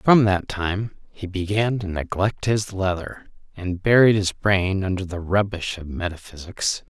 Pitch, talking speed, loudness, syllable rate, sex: 95 Hz, 155 wpm, -22 LUFS, 4.2 syllables/s, male